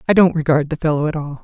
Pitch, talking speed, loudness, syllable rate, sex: 155 Hz, 295 wpm, -17 LUFS, 7.2 syllables/s, male